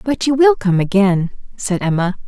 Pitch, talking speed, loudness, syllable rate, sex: 210 Hz, 185 wpm, -15 LUFS, 4.9 syllables/s, female